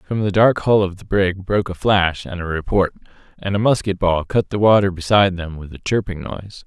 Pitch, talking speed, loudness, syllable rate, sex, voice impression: 95 Hz, 235 wpm, -18 LUFS, 5.7 syllables/s, male, very masculine, very adult-like, middle-aged, very thick, tensed, powerful, slightly bright, soft, slightly muffled, fluent, very cool, very intellectual, slightly refreshing, sincere, very calm, very mature, very friendly, very reassuring, unique, very elegant, slightly wild, very sweet, lively, very kind